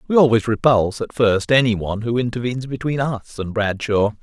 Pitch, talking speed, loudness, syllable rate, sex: 115 Hz, 185 wpm, -19 LUFS, 5.8 syllables/s, male